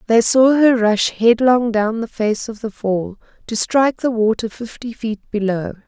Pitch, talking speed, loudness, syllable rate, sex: 225 Hz, 185 wpm, -17 LUFS, 4.3 syllables/s, female